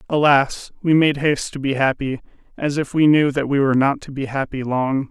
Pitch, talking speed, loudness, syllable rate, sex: 140 Hz, 225 wpm, -19 LUFS, 5.4 syllables/s, male